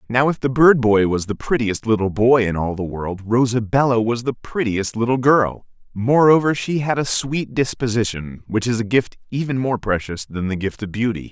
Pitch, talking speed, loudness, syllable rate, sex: 115 Hz, 200 wpm, -19 LUFS, 5.0 syllables/s, male